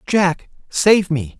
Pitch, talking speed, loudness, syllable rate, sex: 175 Hz, 130 wpm, -17 LUFS, 2.8 syllables/s, male